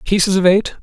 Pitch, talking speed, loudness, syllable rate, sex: 190 Hz, 220 wpm, -14 LUFS, 5.9 syllables/s, male